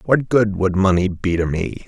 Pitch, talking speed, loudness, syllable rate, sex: 95 Hz, 225 wpm, -18 LUFS, 4.6 syllables/s, male